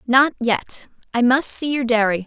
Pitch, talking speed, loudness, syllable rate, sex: 245 Hz, 185 wpm, -18 LUFS, 4.4 syllables/s, female